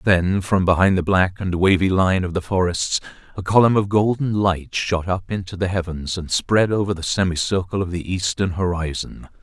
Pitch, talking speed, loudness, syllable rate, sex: 95 Hz, 190 wpm, -20 LUFS, 5.0 syllables/s, male